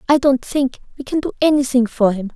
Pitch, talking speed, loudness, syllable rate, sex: 265 Hz, 205 wpm, -17 LUFS, 5.7 syllables/s, female